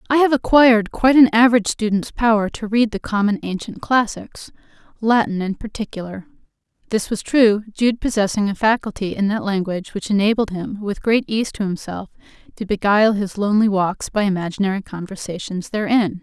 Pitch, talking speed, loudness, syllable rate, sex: 210 Hz, 165 wpm, -19 LUFS, 5.7 syllables/s, female